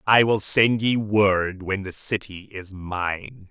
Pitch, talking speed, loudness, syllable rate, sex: 100 Hz, 170 wpm, -22 LUFS, 3.3 syllables/s, male